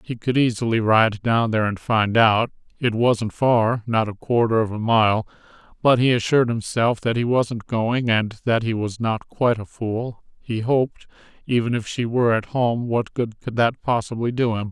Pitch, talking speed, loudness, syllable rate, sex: 115 Hz, 200 wpm, -21 LUFS, 4.7 syllables/s, male